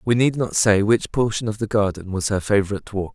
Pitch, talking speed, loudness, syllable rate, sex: 105 Hz, 250 wpm, -21 LUFS, 5.9 syllables/s, male